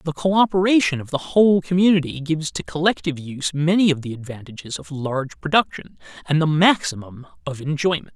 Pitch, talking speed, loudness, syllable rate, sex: 155 Hz, 160 wpm, -20 LUFS, 5.9 syllables/s, male